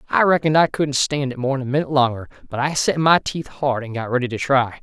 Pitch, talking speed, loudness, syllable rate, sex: 135 Hz, 260 wpm, -19 LUFS, 6.3 syllables/s, male